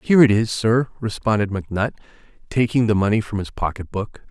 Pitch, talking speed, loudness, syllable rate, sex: 110 Hz, 180 wpm, -20 LUFS, 6.0 syllables/s, male